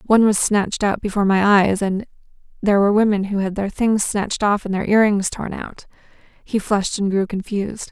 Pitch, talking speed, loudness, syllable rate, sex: 200 Hz, 205 wpm, -19 LUFS, 5.8 syllables/s, female